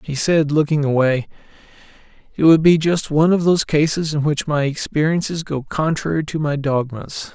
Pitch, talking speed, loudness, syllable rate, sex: 150 Hz, 170 wpm, -18 LUFS, 5.2 syllables/s, male